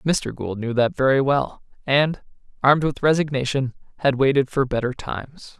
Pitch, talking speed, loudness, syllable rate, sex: 135 Hz, 160 wpm, -21 LUFS, 4.9 syllables/s, male